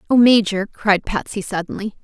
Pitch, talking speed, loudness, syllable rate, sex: 205 Hz, 145 wpm, -18 LUFS, 5.3 syllables/s, female